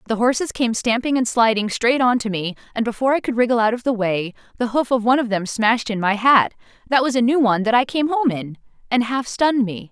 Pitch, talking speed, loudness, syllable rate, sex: 235 Hz, 250 wpm, -19 LUFS, 6.2 syllables/s, female